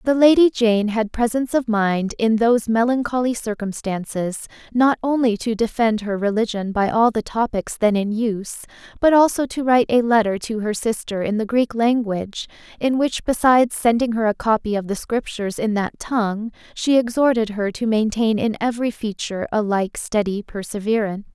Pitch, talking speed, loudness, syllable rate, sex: 225 Hz, 175 wpm, -20 LUFS, 5.3 syllables/s, female